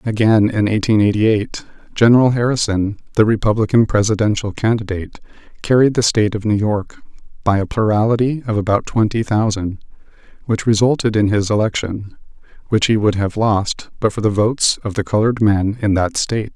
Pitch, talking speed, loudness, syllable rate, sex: 110 Hz, 165 wpm, -16 LUFS, 5.6 syllables/s, male